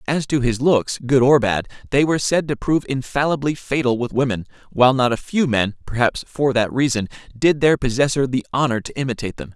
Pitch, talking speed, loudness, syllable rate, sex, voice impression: 130 Hz, 205 wpm, -19 LUFS, 5.8 syllables/s, male, masculine, adult-like, tensed, powerful, bright, clear, fluent, intellectual, refreshing, friendly, reassuring, slightly unique, lively, light